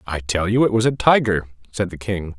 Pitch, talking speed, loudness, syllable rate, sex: 100 Hz, 250 wpm, -19 LUFS, 5.5 syllables/s, male